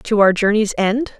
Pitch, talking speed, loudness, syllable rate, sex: 210 Hz, 200 wpm, -16 LUFS, 4.5 syllables/s, female